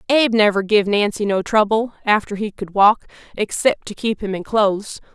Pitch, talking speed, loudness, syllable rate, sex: 210 Hz, 185 wpm, -18 LUFS, 5.2 syllables/s, female